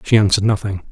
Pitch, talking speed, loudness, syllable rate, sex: 100 Hz, 195 wpm, -16 LUFS, 7.5 syllables/s, male